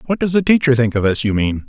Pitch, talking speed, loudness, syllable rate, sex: 130 Hz, 320 wpm, -16 LUFS, 6.6 syllables/s, male